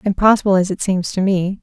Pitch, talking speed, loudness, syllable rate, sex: 190 Hz, 220 wpm, -16 LUFS, 5.9 syllables/s, female